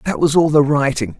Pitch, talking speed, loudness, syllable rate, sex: 150 Hz, 250 wpm, -15 LUFS, 5.6 syllables/s, male